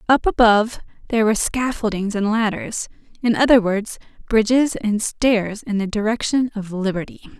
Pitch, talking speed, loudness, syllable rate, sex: 220 Hz, 145 wpm, -19 LUFS, 5.1 syllables/s, female